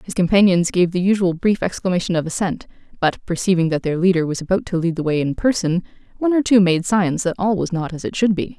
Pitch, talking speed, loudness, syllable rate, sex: 180 Hz, 245 wpm, -19 LUFS, 6.2 syllables/s, female